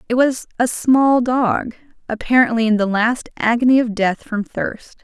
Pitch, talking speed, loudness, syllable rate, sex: 235 Hz, 165 wpm, -17 LUFS, 4.5 syllables/s, female